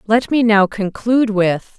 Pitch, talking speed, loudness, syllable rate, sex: 215 Hz, 170 wpm, -16 LUFS, 4.3 syllables/s, female